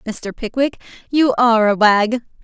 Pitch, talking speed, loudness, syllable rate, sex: 235 Hz, 150 wpm, -16 LUFS, 4.6 syllables/s, female